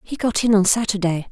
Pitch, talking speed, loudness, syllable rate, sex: 205 Hz, 230 wpm, -18 LUFS, 5.9 syllables/s, female